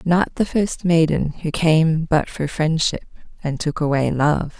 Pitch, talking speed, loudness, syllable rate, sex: 160 Hz, 170 wpm, -19 LUFS, 3.9 syllables/s, female